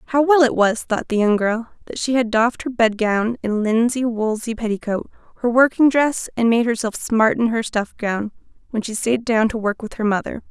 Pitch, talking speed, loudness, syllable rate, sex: 230 Hz, 225 wpm, -19 LUFS, 5.1 syllables/s, female